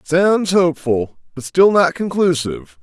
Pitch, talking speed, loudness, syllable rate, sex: 160 Hz, 130 wpm, -16 LUFS, 4.3 syllables/s, male